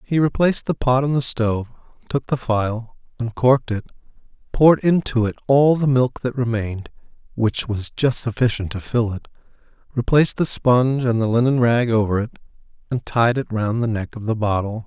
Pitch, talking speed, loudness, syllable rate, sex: 120 Hz, 180 wpm, -20 LUFS, 5.3 syllables/s, male